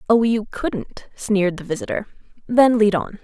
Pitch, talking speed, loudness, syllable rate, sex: 210 Hz, 165 wpm, -20 LUFS, 4.8 syllables/s, female